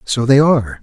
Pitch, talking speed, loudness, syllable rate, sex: 125 Hz, 220 wpm, -13 LUFS, 5.5 syllables/s, male